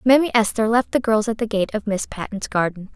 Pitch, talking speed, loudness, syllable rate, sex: 220 Hz, 245 wpm, -20 LUFS, 5.7 syllables/s, female